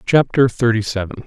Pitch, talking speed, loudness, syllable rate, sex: 115 Hz, 140 wpm, -17 LUFS, 5.7 syllables/s, male